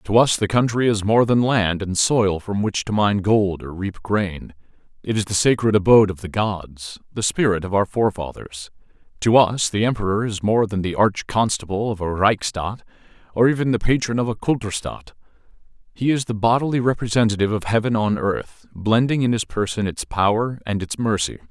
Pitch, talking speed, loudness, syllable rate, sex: 105 Hz, 190 wpm, -20 LUFS, 5.2 syllables/s, male